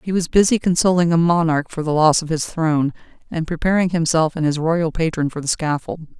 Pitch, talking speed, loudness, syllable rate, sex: 165 Hz, 215 wpm, -18 LUFS, 5.7 syllables/s, female